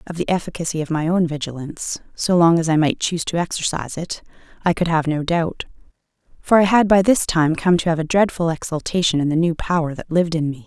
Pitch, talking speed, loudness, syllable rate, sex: 165 Hz, 230 wpm, -19 LUFS, 6.2 syllables/s, female